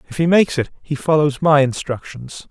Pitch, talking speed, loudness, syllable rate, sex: 145 Hz, 190 wpm, -17 LUFS, 5.4 syllables/s, male